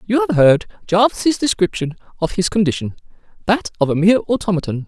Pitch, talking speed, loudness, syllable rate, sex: 195 Hz, 160 wpm, -17 LUFS, 6.1 syllables/s, male